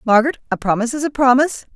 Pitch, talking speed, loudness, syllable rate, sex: 255 Hz, 205 wpm, -17 LUFS, 8.1 syllables/s, female